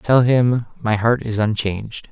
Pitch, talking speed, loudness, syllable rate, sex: 115 Hz, 170 wpm, -19 LUFS, 4.2 syllables/s, male